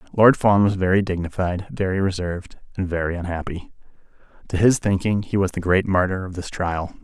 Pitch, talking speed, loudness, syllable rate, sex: 95 Hz, 180 wpm, -21 LUFS, 5.7 syllables/s, male